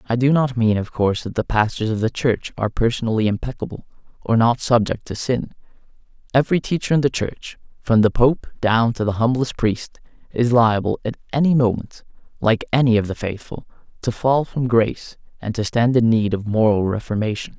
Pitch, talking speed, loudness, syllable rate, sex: 115 Hz, 190 wpm, -20 LUFS, 5.5 syllables/s, male